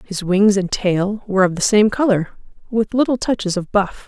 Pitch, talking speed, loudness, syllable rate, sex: 205 Hz, 205 wpm, -17 LUFS, 5.1 syllables/s, female